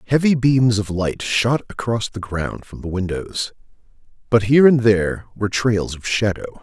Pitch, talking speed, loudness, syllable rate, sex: 110 Hz, 170 wpm, -19 LUFS, 4.9 syllables/s, male